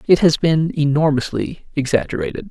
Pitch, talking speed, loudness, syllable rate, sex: 145 Hz, 120 wpm, -18 LUFS, 5.3 syllables/s, male